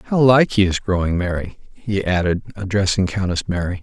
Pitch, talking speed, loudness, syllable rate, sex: 95 Hz, 175 wpm, -19 LUFS, 5.4 syllables/s, male